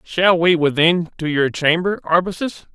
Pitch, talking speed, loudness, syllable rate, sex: 170 Hz, 155 wpm, -17 LUFS, 4.4 syllables/s, male